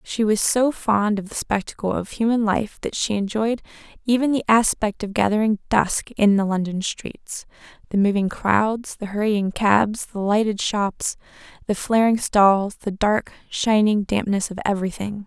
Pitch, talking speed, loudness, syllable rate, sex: 210 Hz, 155 wpm, -21 LUFS, 4.5 syllables/s, female